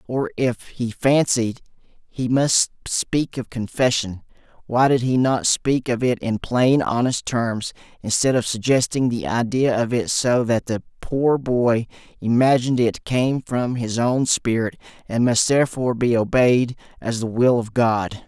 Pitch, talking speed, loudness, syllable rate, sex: 120 Hz, 160 wpm, -20 LUFS, 4.1 syllables/s, male